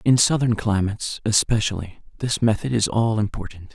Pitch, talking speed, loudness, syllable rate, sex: 110 Hz, 145 wpm, -21 LUFS, 5.3 syllables/s, male